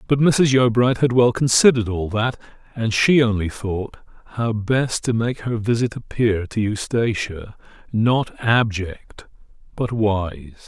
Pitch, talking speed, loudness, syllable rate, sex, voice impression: 115 Hz, 140 wpm, -20 LUFS, 4.0 syllables/s, male, very masculine, slightly old, very thick, tensed, very powerful, bright, soft, muffled, fluent, raspy, cool, intellectual, slightly refreshing, sincere, very calm, friendly, very reassuring, very unique, slightly elegant, wild, slightly sweet, lively, slightly strict, slightly intense